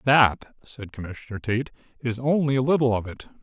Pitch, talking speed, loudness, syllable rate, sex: 120 Hz, 175 wpm, -24 LUFS, 5.5 syllables/s, male